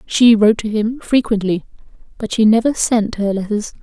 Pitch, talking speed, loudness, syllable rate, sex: 215 Hz, 155 wpm, -16 LUFS, 5.3 syllables/s, female